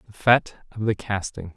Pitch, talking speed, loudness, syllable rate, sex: 105 Hz, 190 wpm, -23 LUFS, 5.6 syllables/s, male